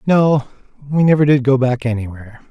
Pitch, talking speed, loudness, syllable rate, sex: 135 Hz, 170 wpm, -15 LUFS, 5.8 syllables/s, male